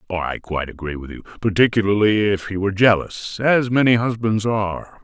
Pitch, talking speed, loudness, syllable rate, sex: 105 Hz, 155 wpm, -19 LUFS, 5.5 syllables/s, male